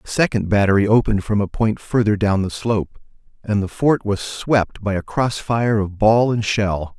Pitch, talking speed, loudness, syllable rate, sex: 105 Hz, 205 wpm, -19 LUFS, 4.8 syllables/s, male